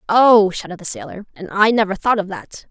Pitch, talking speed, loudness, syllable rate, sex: 205 Hz, 220 wpm, -17 LUFS, 5.3 syllables/s, female